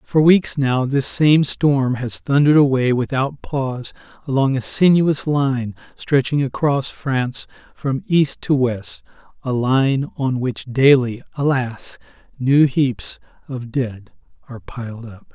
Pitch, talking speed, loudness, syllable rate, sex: 130 Hz, 135 wpm, -18 LUFS, 3.8 syllables/s, male